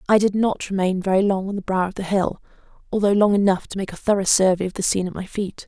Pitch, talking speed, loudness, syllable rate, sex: 195 Hz, 275 wpm, -21 LUFS, 6.6 syllables/s, female